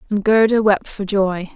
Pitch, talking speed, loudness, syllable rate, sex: 200 Hz, 190 wpm, -17 LUFS, 4.4 syllables/s, female